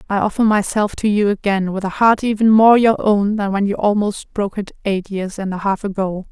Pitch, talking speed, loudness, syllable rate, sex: 205 Hz, 235 wpm, -17 LUFS, 5.4 syllables/s, female